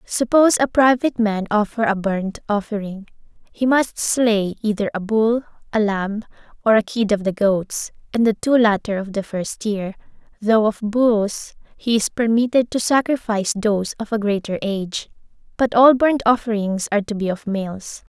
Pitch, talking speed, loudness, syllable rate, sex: 215 Hz, 170 wpm, -19 LUFS, 4.8 syllables/s, female